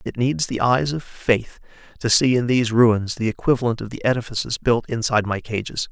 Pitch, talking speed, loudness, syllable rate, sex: 120 Hz, 205 wpm, -20 LUFS, 5.5 syllables/s, male